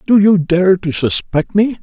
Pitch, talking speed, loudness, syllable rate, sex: 185 Hz, 195 wpm, -13 LUFS, 4.1 syllables/s, male